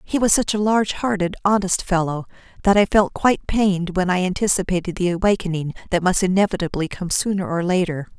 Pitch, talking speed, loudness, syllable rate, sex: 185 Hz, 185 wpm, -20 LUFS, 6.0 syllables/s, female